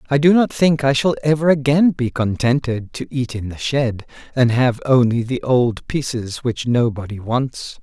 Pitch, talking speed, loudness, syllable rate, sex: 130 Hz, 185 wpm, -18 LUFS, 4.5 syllables/s, male